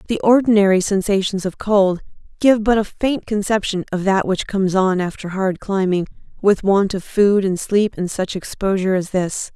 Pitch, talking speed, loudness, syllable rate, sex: 195 Hz, 180 wpm, -18 LUFS, 4.9 syllables/s, female